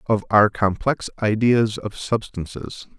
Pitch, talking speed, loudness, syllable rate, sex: 110 Hz, 120 wpm, -21 LUFS, 3.8 syllables/s, male